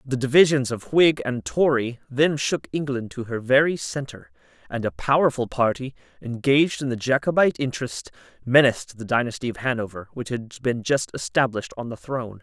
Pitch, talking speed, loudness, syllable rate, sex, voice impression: 125 Hz, 170 wpm, -23 LUFS, 5.5 syllables/s, male, very masculine, slightly young, slightly thick, very tensed, very powerful, very bright, slightly soft, very clear, very fluent, cool, slightly intellectual, very refreshing, very sincere, slightly calm, very friendly, very reassuring, very unique, wild, slightly sweet, very lively, kind, slightly intense, light